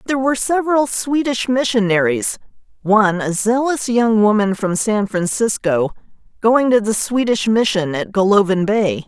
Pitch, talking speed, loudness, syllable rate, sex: 220 Hz, 140 wpm, -16 LUFS, 4.8 syllables/s, female